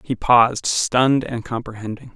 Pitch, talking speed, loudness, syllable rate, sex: 120 Hz, 140 wpm, -18 LUFS, 4.9 syllables/s, male